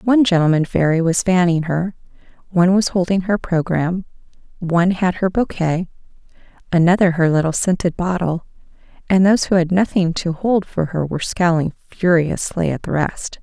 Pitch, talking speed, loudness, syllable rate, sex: 175 Hz, 155 wpm, -18 LUFS, 5.3 syllables/s, female